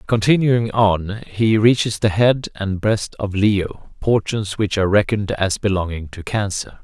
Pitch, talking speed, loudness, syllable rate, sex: 105 Hz, 160 wpm, -19 LUFS, 4.3 syllables/s, male